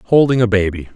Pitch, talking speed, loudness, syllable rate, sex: 110 Hz, 190 wpm, -15 LUFS, 5.7 syllables/s, male